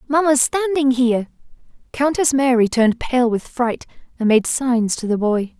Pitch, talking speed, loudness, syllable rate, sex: 250 Hz, 160 wpm, -18 LUFS, 4.7 syllables/s, female